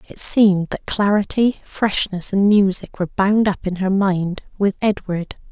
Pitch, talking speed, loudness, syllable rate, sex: 195 Hz, 165 wpm, -18 LUFS, 4.4 syllables/s, female